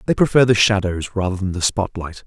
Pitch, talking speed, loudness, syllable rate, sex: 100 Hz, 210 wpm, -18 LUFS, 5.7 syllables/s, male